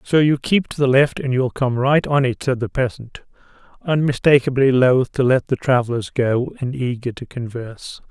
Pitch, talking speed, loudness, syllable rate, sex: 130 Hz, 195 wpm, -18 LUFS, 4.9 syllables/s, male